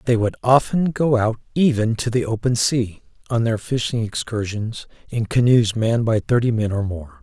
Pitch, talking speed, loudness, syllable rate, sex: 115 Hz, 185 wpm, -20 LUFS, 4.9 syllables/s, male